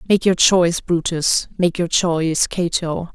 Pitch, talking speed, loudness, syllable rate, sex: 170 Hz, 155 wpm, -18 LUFS, 4.2 syllables/s, female